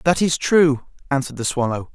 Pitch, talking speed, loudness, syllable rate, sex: 145 Hz, 185 wpm, -20 LUFS, 5.6 syllables/s, male